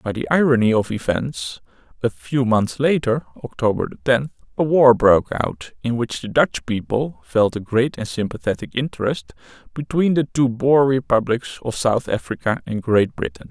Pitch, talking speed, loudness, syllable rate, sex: 120 Hz, 165 wpm, -20 LUFS, 4.6 syllables/s, male